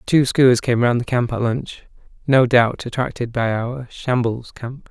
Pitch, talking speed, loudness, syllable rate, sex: 125 Hz, 185 wpm, -19 LUFS, 4.2 syllables/s, male